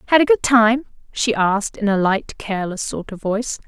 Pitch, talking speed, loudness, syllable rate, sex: 220 Hz, 215 wpm, -19 LUFS, 5.5 syllables/s, female